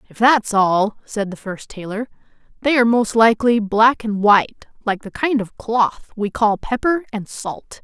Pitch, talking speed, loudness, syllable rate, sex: 220 Hz, 185 wpm, -18 LUFS, 4.5 syllables/s, female